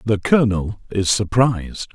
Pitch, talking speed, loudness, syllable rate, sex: 105 Hz, 125 wpm, -18 LUFS, 4.8 syllables/s, male